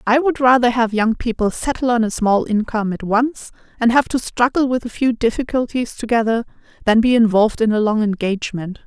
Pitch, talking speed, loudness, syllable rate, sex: 230 Hz, 195 wpm, -17 LUFS, 5.6 syllables/s, female